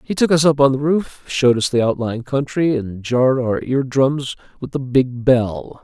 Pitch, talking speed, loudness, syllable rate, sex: 130 Hz, 215 wpm, -18 LUFS, 4.6 syllables/s, male